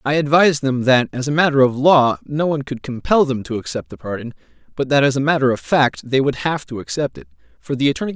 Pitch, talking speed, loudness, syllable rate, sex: 140 Hz, 250 wpm, -18 LUFS, 6.2 syllables/s, male